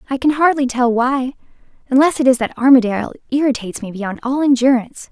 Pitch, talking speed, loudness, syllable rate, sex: 255 Hz, 175 wpm, -16 LUFS, 6.3 syllables/s, female